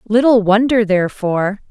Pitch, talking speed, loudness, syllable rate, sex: 210 Hz, 105 wpm, -14 LUFS, 5.2 syllables/s, female